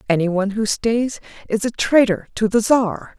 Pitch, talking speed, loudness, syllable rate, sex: 215 Hz, 170 wpm, -19 LUFS, 4.5 syllables/s, female